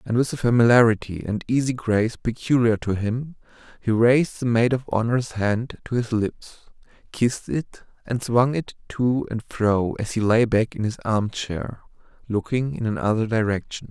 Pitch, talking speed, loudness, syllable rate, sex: 115 Hz, 170 wpm, -22 LUFS, 4.8 syllables/s, male